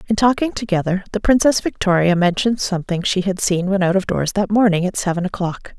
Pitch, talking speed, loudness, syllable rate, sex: 195 Hz, 205 wpm, -18 LUFS, 6.0 syllables/s, female